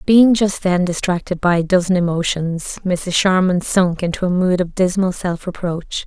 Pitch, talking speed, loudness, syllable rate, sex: 180 Hz, 180 wpm, -17 LUFS, 4.5 syllables/s, female